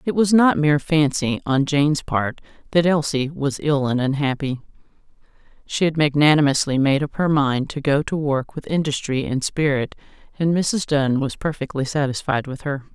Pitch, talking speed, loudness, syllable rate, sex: 145 Hz, 170 wpm, -20 LUFS, 5.0 syllables/s, female